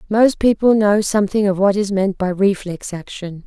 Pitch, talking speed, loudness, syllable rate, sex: 200 Hz, 190 wpm, -17 LUFS, 4.9 syllables/s, female